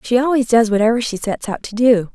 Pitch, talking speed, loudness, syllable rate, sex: 230 Hz, 250 wpm, -16 LUFS, 5.9 syllables/s, female